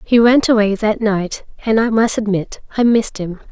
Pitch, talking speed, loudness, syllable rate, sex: 215 Hz, 205 wpm, -16 LUFS, 5.0 syllables/s, female